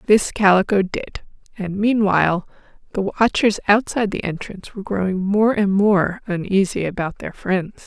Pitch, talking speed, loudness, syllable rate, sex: 200 Hz, 145 wpm, -19 LUFS, 4.9 syllables/s, female